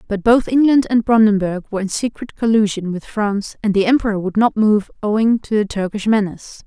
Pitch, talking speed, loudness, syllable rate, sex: 210 Hz, 200 wpm, -17 LUFS, 5.7 syllables/s, female